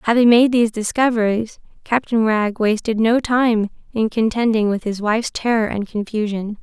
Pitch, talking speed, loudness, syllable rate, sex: 225 Hz, 155 wpm, -18 LUFS, 5.2 syllables/s, female